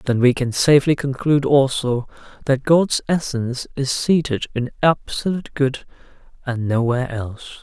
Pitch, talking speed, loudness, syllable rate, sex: 135 Hz, 135 wpm, -19 LUFS, 5.0 syllables/s, male